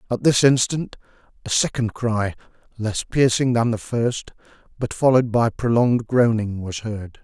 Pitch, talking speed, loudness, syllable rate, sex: 115 Hz, 150 wpm, -20 LUFS, 4.7 syllables/s, male